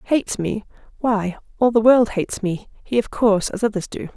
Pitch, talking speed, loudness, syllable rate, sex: 215 Hz, 200 wpm, -20 LUFS, 5.5 syllables/s, female